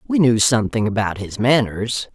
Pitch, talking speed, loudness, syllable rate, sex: 115 Hz, 170 wpm, -18 LUFS, 4.9 syllables/s, female